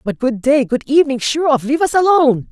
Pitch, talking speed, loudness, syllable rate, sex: 275 Hz, 240 wpm, -15 LUFS, 6.3 syllables/s, female